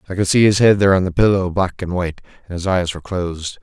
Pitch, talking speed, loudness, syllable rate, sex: 95 Hz, 280 wpm, -17 LUFS, 7.0 syllables/s, male